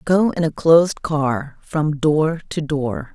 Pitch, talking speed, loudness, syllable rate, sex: 155 Hz, 170 wpm, -19 LUFS, 3.4 syllables/s, female